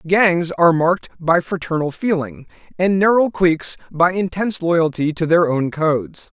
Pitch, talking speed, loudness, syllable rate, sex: 170 Hz, 150 wpm, -17 LUFS, 4.7 syllables/s, male